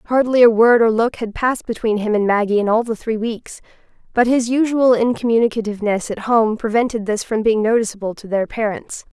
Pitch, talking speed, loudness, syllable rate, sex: 225 Hz, 195 wpm, -17 LUFS, 5.7 syllables/s, female